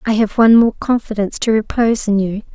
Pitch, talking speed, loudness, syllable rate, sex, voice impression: 215 Hz, 210 wpm, -15 LUFS, 6.4 syllables/s, female, very feminine, slightly young, thin, slightly tensed, slightly weak, dark, slightly hard, slightly muffled, fluent, slightly raspy, cute, intellectual, refreshing, sincere, calm, friendly, very reassuring, unique, elegant, slightly wild, sweet, slightly lively, very kind, modest, light